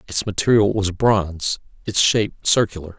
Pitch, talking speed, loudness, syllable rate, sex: 100 Hz, 140 wpm, -19 LUFS, 5.1 syllables/s, male